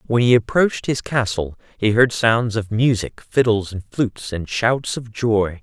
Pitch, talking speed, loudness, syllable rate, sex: 110 Hz, 180 wpm, -19 LUFS, 4.4 syllables/s, male